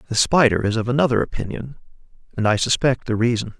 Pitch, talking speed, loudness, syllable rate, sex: 120 Hz, 185 wpm, -19 LUFS, 6.5 syllables/s, male